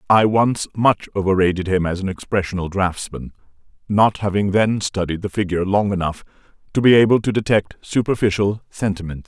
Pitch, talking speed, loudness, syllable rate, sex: 100 Hz, 155 wpm, -19 LUFS, 5.5 syllables/s, male